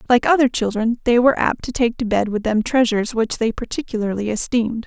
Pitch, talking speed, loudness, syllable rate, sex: 230 Hz, 210 wpm, -19 LUFS, 6.0 syllables/s, female